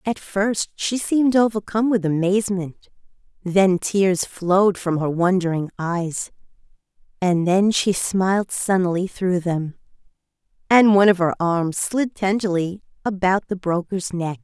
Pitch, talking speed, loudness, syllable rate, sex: 190 Hz, 135 wpm, -20 LUFS, 4.3 syllables/s, female